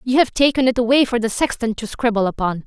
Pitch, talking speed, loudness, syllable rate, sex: 235 Hz, 250 wpm, -18 LUFS, 6.2 syllables/s, female